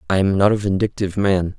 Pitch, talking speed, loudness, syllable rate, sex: 100 Hz, 225 wpm, -18 LUFS, 6.4 syllables/s, male